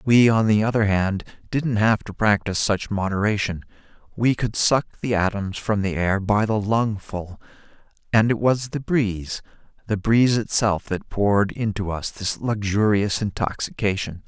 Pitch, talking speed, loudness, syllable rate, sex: 105 Hz, 155 wpm, -22 LUFS, 4.7 syllables/s, male